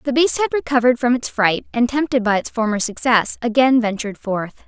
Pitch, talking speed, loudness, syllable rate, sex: 240 Hz, 205 wpm, -18 LUFS, 5.7 syllables/s, female